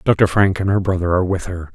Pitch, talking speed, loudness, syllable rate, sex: 90 Hz, 275 wpm, -17 LUFS, 6.1 syllables/s, male